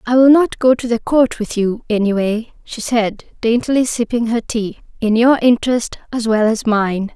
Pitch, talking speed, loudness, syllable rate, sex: 230 Hz, 185 wpm, -16 LUFS, 4.7 syllables/s, female